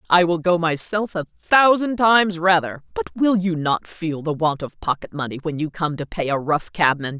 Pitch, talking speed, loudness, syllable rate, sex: 170 Hz, 210 wpm, -20 LUFS, 5.0 syllables/s, female